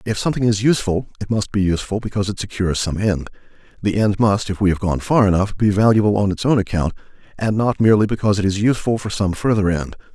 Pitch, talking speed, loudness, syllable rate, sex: 100 Hz, 230 wpm, -18 LUFS, 6.9 syllables/s, male